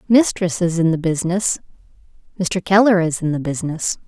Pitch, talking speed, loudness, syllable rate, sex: 175 Hz, 160 wpm, -18 LUFS, 5.6 syllables/s, female